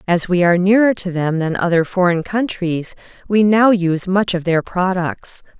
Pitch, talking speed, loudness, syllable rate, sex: 185 Hz, 180 wpm, -16 LUFS, 4.8 syllables/s, female